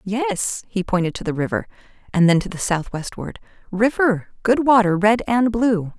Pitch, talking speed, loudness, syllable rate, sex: 200 Hz, 150 wpm, -20 LUFS, 4.6 syllables/s, female